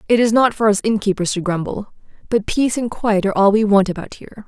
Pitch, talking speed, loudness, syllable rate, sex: 210 Hz, 240 wpm, -17 LUFS, 6.4 syllables/s, female